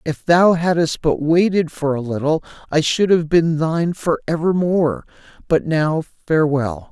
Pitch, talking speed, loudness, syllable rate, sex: 160 Hz, 165 wpm, -18 LUFS, 4.3 syllables/s, male